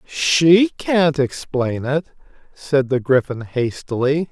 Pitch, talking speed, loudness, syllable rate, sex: 145 Hz, 110 wpm, -18 LUFS, 3.2 syllables/s, male